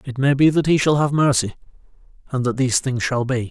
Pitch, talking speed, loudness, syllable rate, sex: 130 Hz, 240 wpm, -19 LUFS, 6.1 syllables/s, male